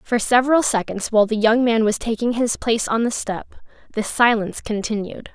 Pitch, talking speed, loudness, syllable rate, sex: 225 Hz, 190 wpm, -19 LUFS, 5.6 syllables/s, female